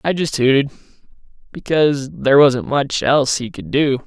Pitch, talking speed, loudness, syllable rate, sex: 140 Hz, 160 wpm, -16 LUFS, 5.1 syllables/s, male